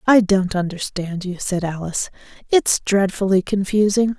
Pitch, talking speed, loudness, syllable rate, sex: 195 Hz, 130 wpm, -19 LUFS, 4.7 syllables/s, female